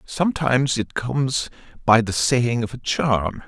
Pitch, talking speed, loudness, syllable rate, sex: 125 Hz, 155 wpm, -21 LUFS, 4.4 syllables/s, male